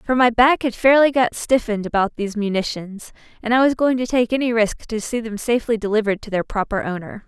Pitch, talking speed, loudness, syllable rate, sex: 225 Hz, 225 wpm, -19 LUFS, 6.2 syllables/s, female